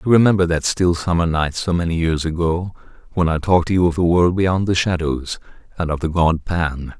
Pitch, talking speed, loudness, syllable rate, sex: 85 Hz, 225 wpm, -18 LUFS, 5.5 syllables/s, male